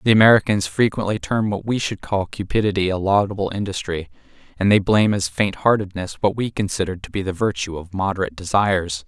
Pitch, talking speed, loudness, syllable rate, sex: 100 Hz, 185 wpm, -20 LUFS, 6.1 syllables/s, male